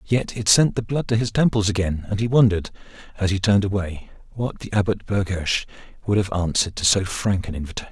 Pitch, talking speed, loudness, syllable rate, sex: 100 Hz, 210 wpm, -21 LUFS, 6.2 syllables/s, male